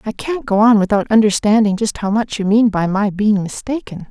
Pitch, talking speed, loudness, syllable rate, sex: 215 Hz, 220 wpm, -15 LUFS, 5.3 syllables/s, female